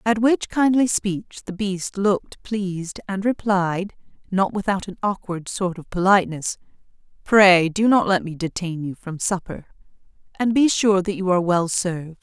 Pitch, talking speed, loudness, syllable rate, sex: 190 Hz, 165 wpm, -21 LUFS, 4.6 syllables/s, female